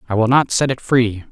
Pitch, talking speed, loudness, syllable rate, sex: 120 Hz, 275 wpm, -16 LUFS, 5.5 syllables/s, male